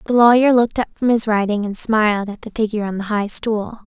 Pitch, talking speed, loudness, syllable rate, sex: 220 Hz, 245 wpm, -17 LUFS, 6.2 syllables/s, female